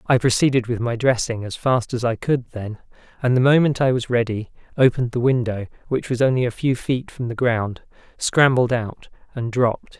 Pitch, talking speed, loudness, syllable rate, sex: 120 Hz, 200 wpm, -20 LUFS, 5.2 syllables/s, male